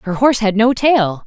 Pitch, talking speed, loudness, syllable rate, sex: 220 Hz, 235 wpm, -14 LUFS, 5.3 syllables/s, female